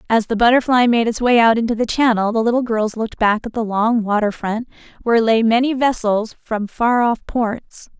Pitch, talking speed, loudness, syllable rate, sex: 230 Hz, 210 wpm, -17 LUFS, 5.2 syllables/s, female